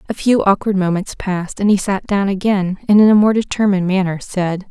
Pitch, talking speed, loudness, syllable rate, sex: 195 Hz, 215 wpm, -16 LUFS, 5.7 syllables/s, female